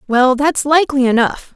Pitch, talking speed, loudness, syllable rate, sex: 270 Hz, 155 wpm, -14 LUFS, 5.1 syllables/s, female